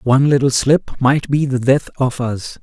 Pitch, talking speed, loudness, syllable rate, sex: 135 Hz, 205 wpm, -16 LUFS, 4.6 syllables/s, male